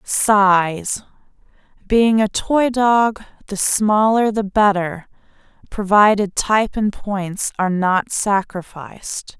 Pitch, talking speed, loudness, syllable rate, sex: 205 Hz, 95 wpm, -17 LUFS, 3.3 syllables/s, female